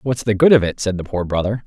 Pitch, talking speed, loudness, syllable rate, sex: 105 Hz, 325 wpm, -17 LUFS, 6.1 syllables/s, male